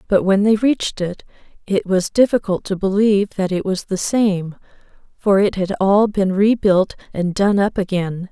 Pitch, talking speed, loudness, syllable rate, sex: 195 Hz, 180 wpm, -18 LUFS, 4.6 syllables/s, female